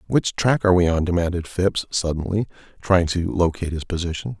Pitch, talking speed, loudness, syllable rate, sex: 90 Hz, 175 wpm, -21 LUFS, 5.8 syllables/s, male